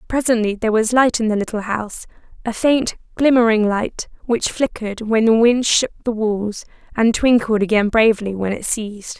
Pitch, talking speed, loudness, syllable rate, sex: 225 Hz, 170 wpm, -18 LUFS, 5.2 syllables/s, female